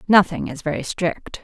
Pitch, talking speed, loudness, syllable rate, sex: 160 Hz, 165 wpm, -21 LUFS, 4.8 syllables/s, female